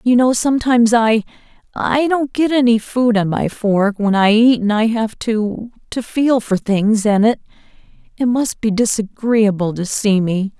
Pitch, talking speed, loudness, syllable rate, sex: 225 Hz, 165 wpm, -16 LUFS, 4.3 syllables/s, female